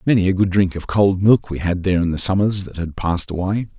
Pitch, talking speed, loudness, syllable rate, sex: 95 Hz, 270 wpm, -19 LUFS, 6.2 syllables/s, male